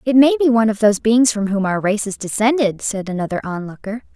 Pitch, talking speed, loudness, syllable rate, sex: 220 Hz, 230 wpm, -17 LUFS, 6.0 syllables/s, female